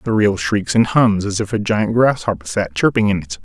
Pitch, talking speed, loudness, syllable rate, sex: 105 Hz, 245 wpm, -17 LUFS, 5.1 syllables/s, male